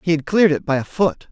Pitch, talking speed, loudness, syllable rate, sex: 165 Hz, 320 wpm, -18 LUFS, 6.7 syllables/s, male